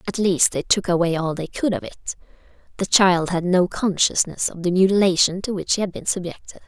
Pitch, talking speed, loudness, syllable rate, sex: 180 Hz, 215 wpm, -20 LUFS, 5.5 syllables/s, female